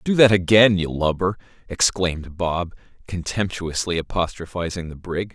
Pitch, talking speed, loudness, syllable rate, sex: 90 Hz, 125 wpm, -21 LUFS, 4.8 syllables/s, male